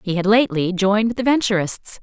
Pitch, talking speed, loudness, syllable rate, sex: 205 Hz, 180 wpm, -18 LUFS, 5.8 syllables/s, female